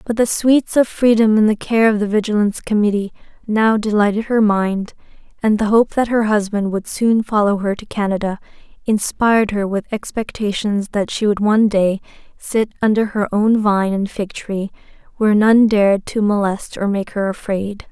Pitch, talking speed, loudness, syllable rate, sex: 210 Hz, 180 wpm, -17 LUFS, 5.0 syllables/s, female